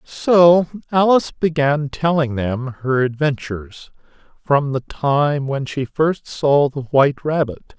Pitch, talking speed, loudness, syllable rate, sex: 145 Hz, 130 wpm, -18 LUFS, 3.7 syllables/s, male